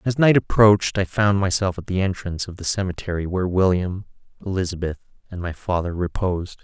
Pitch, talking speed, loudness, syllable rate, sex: 95 Hz, 170 wpm, -21 LUFS, 6.0 syllables/s, male